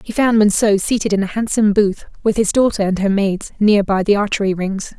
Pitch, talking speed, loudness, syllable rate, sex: 205 Hz, 230 wpm, -16 LUFS, 5.6 syllables/s, female